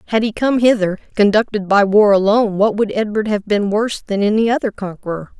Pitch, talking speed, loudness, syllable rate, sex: 210 Hz, 200 wpm, -16 LUFS, 6.0 syllables/s, female